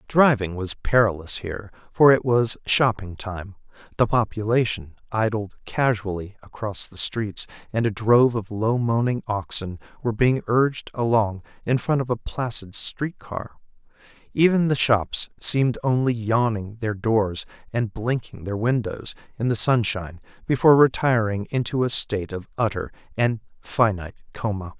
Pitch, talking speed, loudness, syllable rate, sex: 110 Hz, 145 wpm, -23 LUFS, 4.7 syllables/s, male